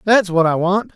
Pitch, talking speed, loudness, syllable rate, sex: 190 Hz, 250 wpm, -16 LUFS, 4.9 syllables/s, male